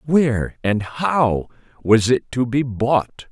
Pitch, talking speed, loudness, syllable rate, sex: 125 Hz, 145 wpm, -19 LUFS, 3.2 syllables/s, male